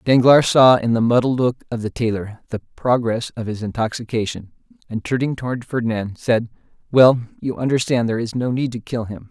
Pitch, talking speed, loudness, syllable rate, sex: 120 Hz, 185 wpm, -19 LUFS, 5.5 syllables/s, male